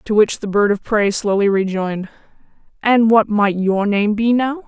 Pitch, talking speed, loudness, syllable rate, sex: 210 Hz, 195 wpm, -16 LUFS, 4.7 syllables/s, female